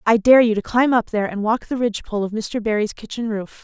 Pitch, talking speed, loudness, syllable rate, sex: 220 Hz, 265 wpm, -19 LUFS, 6.3 syllables/s, female